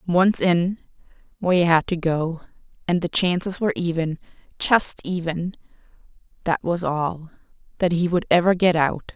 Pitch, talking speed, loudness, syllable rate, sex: 175 Hz, 140 wpm, -22 LUFS, 4.8 syllables/s, female